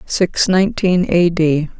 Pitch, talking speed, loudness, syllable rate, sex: 175 Hz, 135 wpm, -15 LUFS, 1.9 syllables/s, female